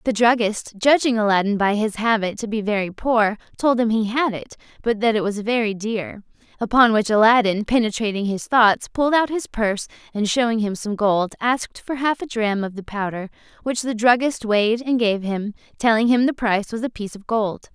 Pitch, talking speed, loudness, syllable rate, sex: 225 Hz, 205 wpm, -20 LUFS, 5.4 syllables/s, female